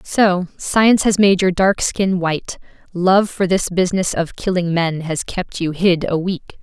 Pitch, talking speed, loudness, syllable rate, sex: 180 Hz, 190 wpm, -17 LUFS, 4.4 syllables/s, female